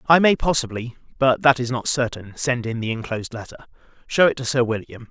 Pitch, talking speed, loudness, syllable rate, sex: 125 Hz, 210 wpm, -21 LUFS, 5.9 syllables/s, male